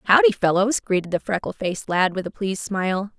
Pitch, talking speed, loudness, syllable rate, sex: 200 Hz, 205 wpm, -22 LUFS, 5.8 syllables/s, female